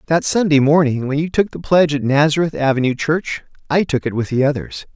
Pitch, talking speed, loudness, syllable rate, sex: 145 Hz, 220 wpm, -17 LUFS, 5.8 syllables/s, male